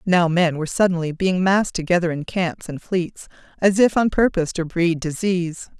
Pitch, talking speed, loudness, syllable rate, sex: 175 Hz, 185 wpm, -20 LUFS, 5.2 syllables/s, female